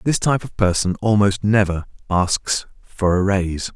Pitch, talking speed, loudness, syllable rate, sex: 100 Hz, 160 wpm, -19 LUFS, 4.9 syllables/s, male